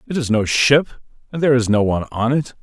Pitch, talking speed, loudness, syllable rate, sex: 125 Hz, 250 wpm, -17 LUFS, 6.2 syllables/s, male